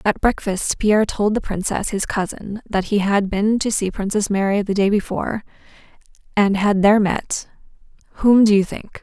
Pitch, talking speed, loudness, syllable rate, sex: 205 Hz, 175 wpm, -19 LUFS, 5.0 syllables/s, female